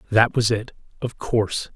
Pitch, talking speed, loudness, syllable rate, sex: 115 Hz, 170 wpm, -22 LUFS, 4.8 syllables/s, male